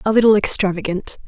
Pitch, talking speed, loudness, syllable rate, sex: 200 Hz, 140 wpm, -17 LUFS, 6.3 syllables/s, female